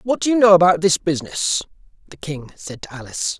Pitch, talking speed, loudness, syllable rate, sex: 170 Hz, 210 wpm, -17 LUFS, 6.2 syllables/s, male